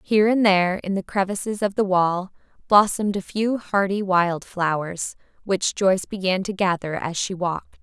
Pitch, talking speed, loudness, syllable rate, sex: 190 Hz, 175 wpm, -22 LUFS, 5.0 syllables/s, female